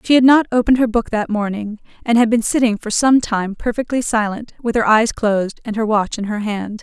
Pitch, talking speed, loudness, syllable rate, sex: 225 Hz, 235 wpm, -17 LUFS, 5.5 syllables/s, female